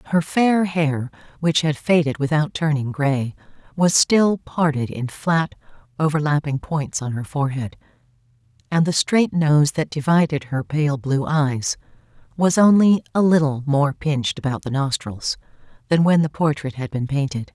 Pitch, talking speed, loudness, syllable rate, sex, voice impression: 150 Hz, 155 wpm, -20 LUFS, 4.5 syllables/s, female, very feminine, very middle-aged, slightly thin, tensed, very powerful, slightly bright, slightly soft, clear, fluent, slightly raspy, slightly cool, intellectual, refreshing, sincere, calm, slightly friendly, reassuring, unique, elegant, slightly wild, slightly sweet, lively, kind, slightly intense, sharp